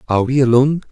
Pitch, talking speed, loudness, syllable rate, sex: 130 Hz, 195 wpm, -14 LUFS, 8.7 syllables/s, male